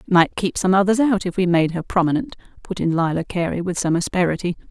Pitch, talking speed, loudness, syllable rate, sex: 180 Hz, 230 wpm, -20 LUFS, 6.2 syllables/s, female